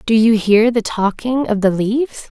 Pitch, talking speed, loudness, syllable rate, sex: 225 Hz, 200 wpm, -16 LUFS, 4.6 syllables/s, female